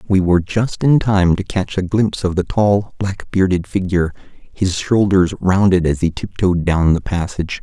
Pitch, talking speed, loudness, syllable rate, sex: 95 Hz, 190 wpm, -17 LUFS, 4.8 syllables/s, male